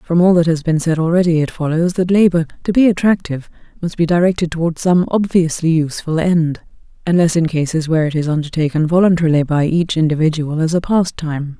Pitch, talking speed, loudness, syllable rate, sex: 165 Hz, 185 wpm, -15 LUFS, 6.1 syllables/s, female